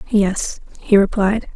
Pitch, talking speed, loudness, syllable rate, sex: 200 Hz, 115 wpm, -17 LUFS, 3.6 syllables/s, female